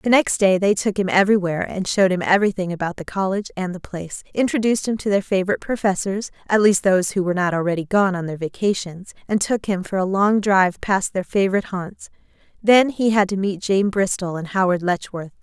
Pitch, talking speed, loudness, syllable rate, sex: 195 Hz, 215 wpm, -20 LUFS, 6.1 syllables/s, female